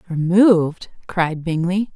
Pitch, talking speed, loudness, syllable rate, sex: 175 Hz, 90 wpm, -18 LUFS, 3.7 syllables/s, female